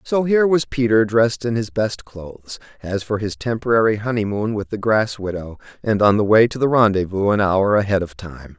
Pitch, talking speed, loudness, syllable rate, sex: 110 Hz, 210 wpm, -18 LUFS, 5.4 syllables/s, male